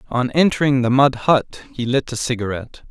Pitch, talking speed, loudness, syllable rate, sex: 130 Hz, 185 wpm, -18 LUFS, 5.4 syllables/s, male